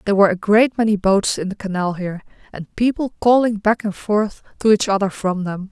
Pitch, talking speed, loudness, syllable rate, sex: 205 Hz, 220 wpm, -18 LUFS, 5.7 syllables/s, female